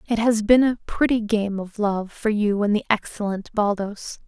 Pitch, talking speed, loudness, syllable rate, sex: 215 Hz, 195 wpm, -22 LUFS, 4.6 syllables/s, female